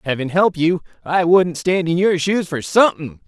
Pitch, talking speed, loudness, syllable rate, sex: 170 Hz, 200 wpm, -17 LUFS, 4.8 syllables/s, male